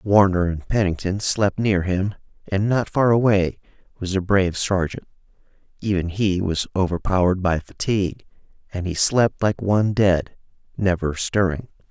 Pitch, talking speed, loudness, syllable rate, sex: 95 Hz, 140 wpm, -21 LUFS, 4.7 syllables/s, male